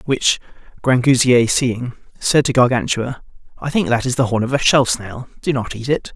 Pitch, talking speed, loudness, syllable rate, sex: 125 Hz, 195 wpm, -17 LUFS, 4.9 syllables/s, male